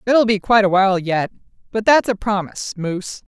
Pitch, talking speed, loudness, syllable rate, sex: 205 Hz, 195 wpm, -18 LUFS, 6.0 syllables/s, female